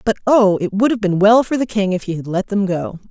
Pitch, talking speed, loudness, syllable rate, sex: 200 Hz, 310 wpm, -16 LUFS, 5.7 syllables/s, female